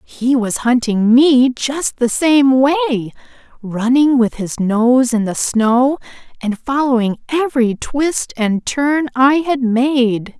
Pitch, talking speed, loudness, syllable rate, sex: 255 Hz, 140 wpm, -15 LUFS, 3.4 syllables/s, female